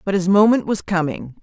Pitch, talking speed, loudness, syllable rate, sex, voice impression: 190 Hz, 210 wpm, -18 LUFS, 5.4 syllables/s, female, feminine, adult-like, tensed, powerful, intellectual, reassuring, elegant, lively, strict, sharp